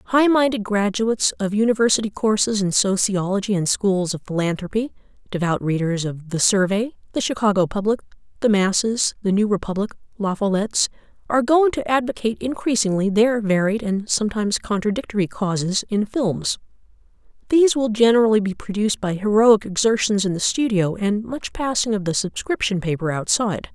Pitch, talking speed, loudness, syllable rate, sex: 210 Hz, 150 wpm, -20 LUFS, 5.5 syllables/s, female